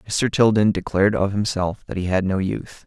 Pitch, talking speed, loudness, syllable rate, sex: 100 Hz, 210 wpm, -21 LUFS, 5.0 syllables/s, male